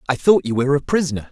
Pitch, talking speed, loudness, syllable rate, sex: 135 Hz, 275 wpm, -18 LUFS, 8.0 syllables/s, male